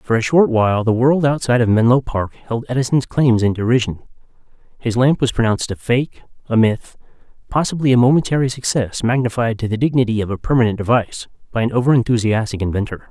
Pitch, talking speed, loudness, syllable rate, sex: 120 Hz, 180 wpm, -17 LUFS, 6.2 syllables/s, male